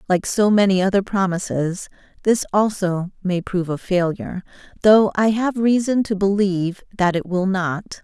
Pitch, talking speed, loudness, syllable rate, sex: 195 Hz, 155 wpm, -19 LUFS, 4.8 syllables/s, female